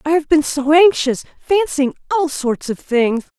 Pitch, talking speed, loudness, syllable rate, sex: 295 Hz, 175 wpm, -16 LUFS, 4.2 syllables/s, female